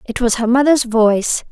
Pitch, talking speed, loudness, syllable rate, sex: 240 Hz, 200 wpm, -14 LUFS, 5.1 syllables/s, female